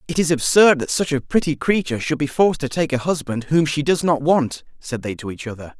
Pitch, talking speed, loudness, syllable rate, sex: 145 Hz, 260 wpm, -19 LUFS, 5.9 syllables/s, male